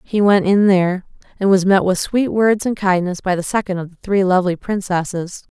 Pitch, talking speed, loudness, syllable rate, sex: 190 Hz, 215 wpm, -17 LUFS, 5.3 syllables/s, female